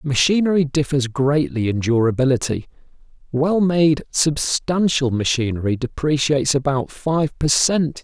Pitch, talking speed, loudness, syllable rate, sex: 145 Hz, 105 wpm, -19 LUFS, 4.4 syllables/s, male